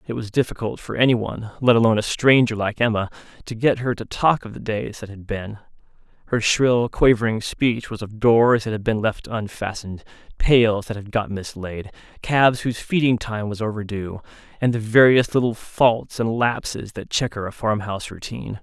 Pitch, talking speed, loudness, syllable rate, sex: 110 Hz, 185 wpm, -21 LUFS, 5.2 syllables/s, male